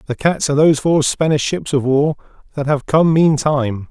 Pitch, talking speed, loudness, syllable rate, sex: 145 Hz, 200 wpm, -16 LUFS, 5.4 syllables/s, male